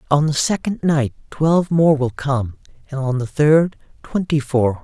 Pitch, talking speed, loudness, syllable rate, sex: 145 Hz, 175 wpm, -18 LUFS, 4.4 syllables/s, male